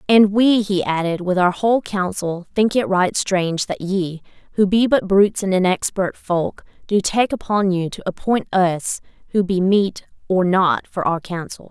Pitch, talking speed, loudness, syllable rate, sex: 190 Hz, 185 wpm, -19 LUFS, 4.5 syllables/s, female